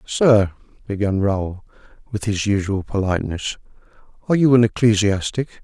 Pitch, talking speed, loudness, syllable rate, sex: 105 Hz, 115 wpm, -19 LUFS, 5.1 syllables/s, male